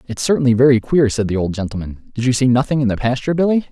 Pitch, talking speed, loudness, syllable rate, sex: 125 Hz, 260 wpm, -16 LUFS, 7.1 syllables/s, male